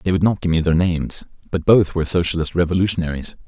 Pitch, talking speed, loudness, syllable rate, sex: 85 Hz, 205 wpm, -19 LUFS, 6.9 syllables/s, male